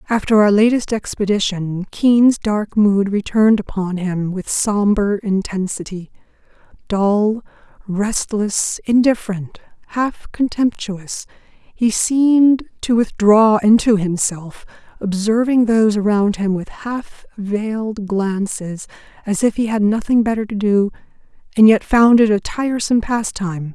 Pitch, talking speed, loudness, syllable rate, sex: 210 Hz, 120 wpm, -17 LUFS, 4.1 syllables/s, female